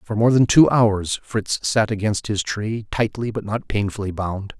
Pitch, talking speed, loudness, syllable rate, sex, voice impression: 105 Hz, 195 wpm, -20 LUFS, 4.4 syllables/s, male, very masculine, very adult-like, old, very thick, slightly tensed, powerful, slightly bright, slightly hard, muffled, slightly fluent, slightly raspy, very cool, intellectual, sincere, very calm, very mature, friendly, very reassuring, unique, slightly elegant, very wild, slightly sweet, lively, kind, slightly modest